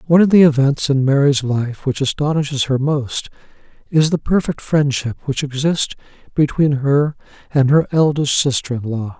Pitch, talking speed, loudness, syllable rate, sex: 140 Hz, 165 wpm, -17 LUFS, 5.0 syllables/s, male